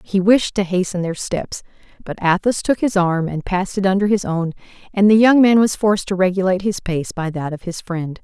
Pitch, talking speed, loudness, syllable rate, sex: 190 Hz, 235 wpm, -18 LUFS, 5.5 syllables/s, female